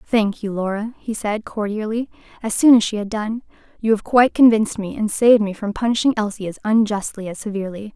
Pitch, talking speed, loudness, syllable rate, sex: 215 Hz, 205 wpm, -19 LUFS, 5.9 syllables/s, female